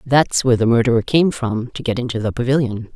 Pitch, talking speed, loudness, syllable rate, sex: 120 Hz, 225 wpm, -18 LUFS, 6.0 syllables/s, female